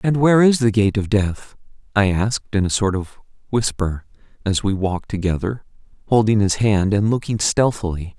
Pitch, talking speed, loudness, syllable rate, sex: 105 Hz, 175 wpm, -19 LUFS, 5.2 syllables/s, male